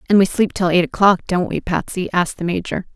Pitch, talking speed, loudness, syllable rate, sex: 185 Hz, 245 wpm, -18 LUFS, 6.0 syllables/s, female